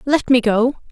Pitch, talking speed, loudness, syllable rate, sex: 245 Hz, 195 wpm, -16 LUFS, 4.1 syllables/s, female